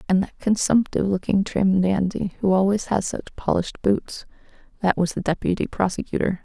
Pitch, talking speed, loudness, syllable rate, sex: 190 Hz, 150 wpm, -22 LUFS, 5.6 syllables/s, female